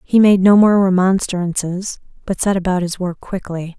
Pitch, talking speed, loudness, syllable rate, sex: 185 Hz, 175 wpm, -16 LUFS, 4.7 syllables/s, female